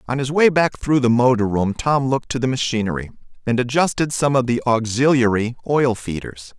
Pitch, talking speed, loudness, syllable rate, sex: 125 Hz, 190 wpm, -19 LUFS, 5.4 syllables/s, male